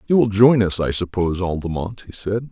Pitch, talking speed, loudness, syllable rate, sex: 100 Hz, 215 wpm, -19 LUFS, 5.6 syllables/s, male